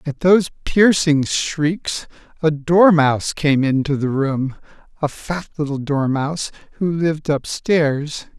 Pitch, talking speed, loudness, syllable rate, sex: 155 Hz, 120 wpm, -18 LUFS, 3.9 syllables/s, male